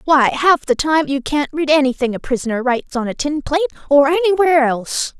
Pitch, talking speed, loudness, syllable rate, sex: 290 Hz, 210 wpm, -16 LUFS, 6.1 syllables/s, female